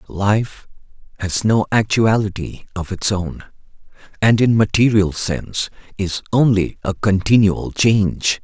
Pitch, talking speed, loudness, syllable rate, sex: 100 Hz, 115 wpm, -17 LUFS, 4.0 syllables/s, male